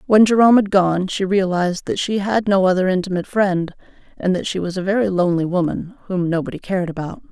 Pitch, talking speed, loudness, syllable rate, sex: 190 Hz, 205 wpm, -18 LUFS, 6.2 syllables/s, female